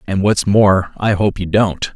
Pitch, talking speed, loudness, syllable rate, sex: 95 Hz, 215 wpm, -15 LUFS, 4.0 syllables/s, male